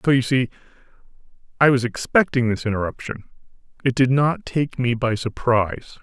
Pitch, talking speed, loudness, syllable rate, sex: 125 Hz, 150 wpm, -21 LUFS, 5.2 syllables/s, male